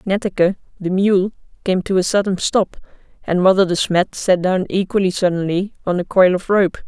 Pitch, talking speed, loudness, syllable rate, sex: 185 Hz, 185 wpm, -17 LUFS, 5.2 syllables/s, female